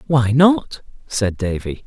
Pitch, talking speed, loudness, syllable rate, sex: 115 Hz, 130 wpm, -18 LUFS, 3.4 syllables/s, male